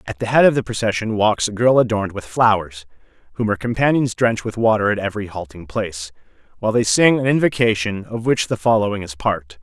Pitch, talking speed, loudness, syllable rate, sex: 105 Hz, 205 wpm, -18 LUFS, 6.0 syllables/s, male